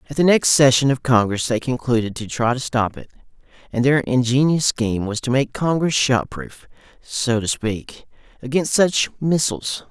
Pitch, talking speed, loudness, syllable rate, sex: 130 Hz, 175 wpm, -19 LUFS, 4.8 syllables/s, male